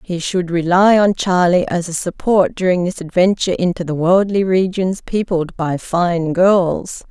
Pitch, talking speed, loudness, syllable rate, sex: 180 Hz, 160 wpm, -16 LUFS, 4.2 syllables/s, female